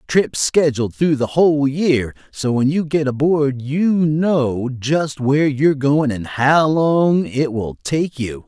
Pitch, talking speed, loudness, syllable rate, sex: 140 Hz, 170 wpm, -17 LUFS, 3.7 syllables/s, male